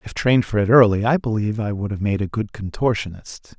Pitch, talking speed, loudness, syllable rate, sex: 105 Hz, 235 wpm, -20 LUFS, 6.0 syllables/s, male